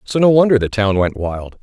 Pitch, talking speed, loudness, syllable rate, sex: 115 Hz, 260 wpm, -15 LUFS, 5.3 syllables/s, male